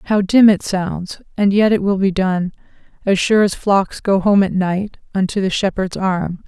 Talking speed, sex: 205 wpm, female